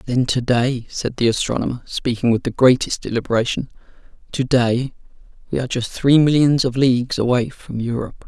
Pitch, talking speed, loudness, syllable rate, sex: 125 Hz, 160 wpm, -19 LUFS, 5.4 syllables/s, male